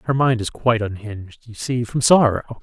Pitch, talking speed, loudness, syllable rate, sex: 115 Hz, 205 wpm, -19 LUFS, 5.9 syllables/s, male